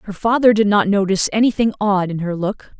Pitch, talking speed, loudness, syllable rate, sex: 200 Hz, 215 wpm, -17 LUFS, 5.9 syllables/s, female